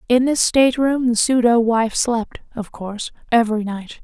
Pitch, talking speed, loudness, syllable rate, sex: 235 Hz, 180 wpm, -18 LUFS, 4.8 syllables/s, female